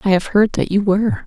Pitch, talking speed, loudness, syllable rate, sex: 195 Hz, 285 wpm, -16 LUFS, 6.0 syllables/s, female